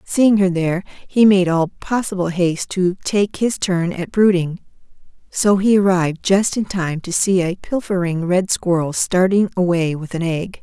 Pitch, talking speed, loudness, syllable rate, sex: 185 Hz, 175 wpm, -18 LUFS, 4.5 syllables/s, female